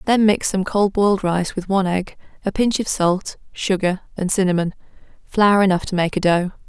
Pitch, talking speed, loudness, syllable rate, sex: 190 Hz, 200 wpm, -19 LUFS, 5.2 syllables/s, female